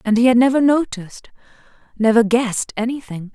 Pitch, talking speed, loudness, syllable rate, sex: 235 Hz, 145 wpm, -17 LUFS, 5.9 syllables/s, female